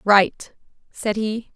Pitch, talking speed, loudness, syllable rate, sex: 210 Hz, 115 wpm, -21 LUFS, 3.6 syllables/s, female